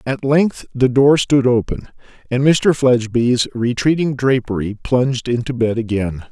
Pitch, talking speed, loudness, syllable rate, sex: 125 Hz, 140 wpm, -16 LUFS, 4.4 syllables/s, male